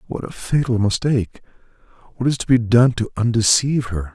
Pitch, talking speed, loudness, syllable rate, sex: 115 Hz, 175 wpm, -18 LUFS, 5.7 syllables/s, male